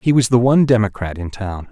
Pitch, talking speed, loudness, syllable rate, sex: 110 Hz, 245 wpm, -16 LUFS, 6.2 syllables/s, male